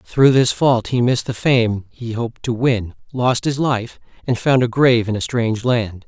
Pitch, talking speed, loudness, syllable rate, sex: 120 Hz, 215 wpm, -18 LUFS, 4.7 syllables/s, male